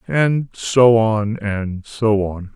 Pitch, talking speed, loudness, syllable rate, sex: 110 Hz, 140 wpm, -18 LUFS, 2.5 syllables/s, male